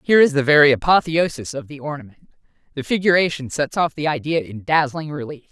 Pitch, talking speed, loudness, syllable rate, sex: 150 Hz, 185 wpm, -19 LUFS, 6.0 syllables/s, female